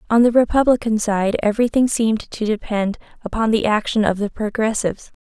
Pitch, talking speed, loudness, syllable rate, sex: 220 Hz, 160 wpm, -19 LUFS, 5.7 syllables/s, female